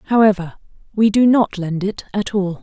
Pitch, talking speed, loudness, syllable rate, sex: 200 Hz, 185 wpm, -17 LUFS, 4.6 syllables/s, female